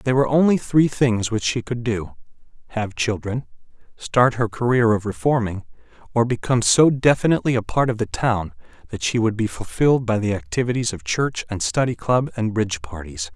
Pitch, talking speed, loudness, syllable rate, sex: 115 Hz, 185 wpm, -21 LUFS, 5.5 syllables/s, male